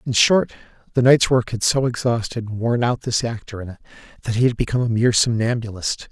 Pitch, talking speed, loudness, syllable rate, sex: 115 Hz, 215 wpm, -19 LUFS, 6.1 syllables/s, male